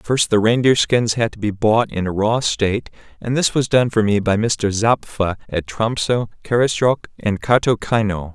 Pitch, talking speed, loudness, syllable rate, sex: 110 Hz, 185 wpm, -18 LUFS, 4.6 syllables/s, male